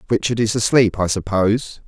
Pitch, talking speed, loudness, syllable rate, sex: 105 Hz, 160 wpm, -18 LUFS, 5.5 syllables/s, male